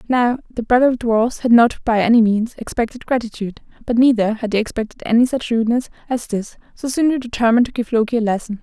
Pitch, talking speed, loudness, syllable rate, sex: 235 Hz, 200 wpm, -18 LUFS, 6.2 syllables/s, female